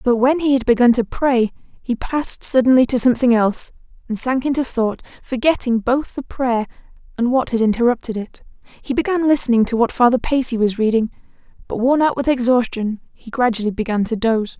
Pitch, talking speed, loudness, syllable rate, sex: 245 Hz, 185 wpm, -18 LUFS, 5.7 syllables/s, female